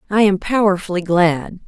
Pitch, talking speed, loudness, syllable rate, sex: 190 Hz, 145 wpm, -17 LUFS, 4.9 syllables/s, female